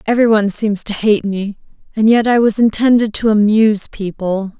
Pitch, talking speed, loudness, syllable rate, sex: 215 Hz, 170 wpm, -14 LUFS, 5.1 syllables/s, female